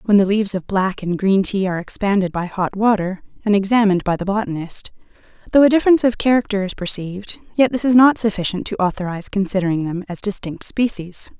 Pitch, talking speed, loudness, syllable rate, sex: 200 Hz, 195 wpm, -18 LUFS, 6.2 syllables/s, female